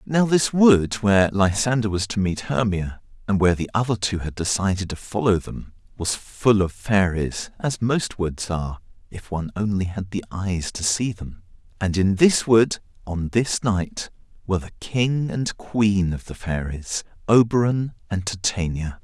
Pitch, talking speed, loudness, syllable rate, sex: 100 Hz, 170 wpm, -22 LUFS, 4.4 syllables/s, male